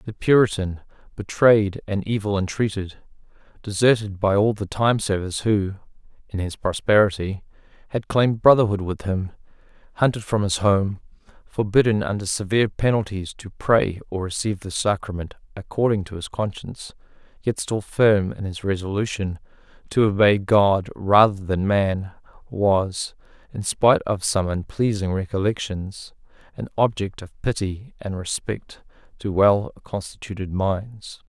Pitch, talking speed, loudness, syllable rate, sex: 100 Hz, 130 wpm, -22 LUFS, 4.7 syllables/s, male